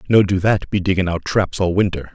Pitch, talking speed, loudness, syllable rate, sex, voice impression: 95 Hz, 250 wpm, -18 LUFS, 5.6 syllables/s, male, masculine, adult-like, tensed, clear, cool, intellectual, reassuring, slightly wild, kind, slightly modest